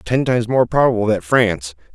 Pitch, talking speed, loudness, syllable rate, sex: 110 Hz, 185 wpm, -17 LUFS, 6.0 syllables/s, male